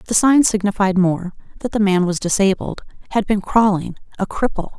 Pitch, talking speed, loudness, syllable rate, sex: 200 Hz, 140 wpm, -18 LUFS, 5.4 syllables/s, female